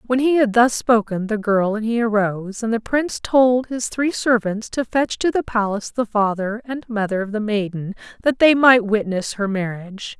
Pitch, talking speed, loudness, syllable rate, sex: 225 Hz, 205 wpm, -19 LUFS, 4.9 syllables/s, female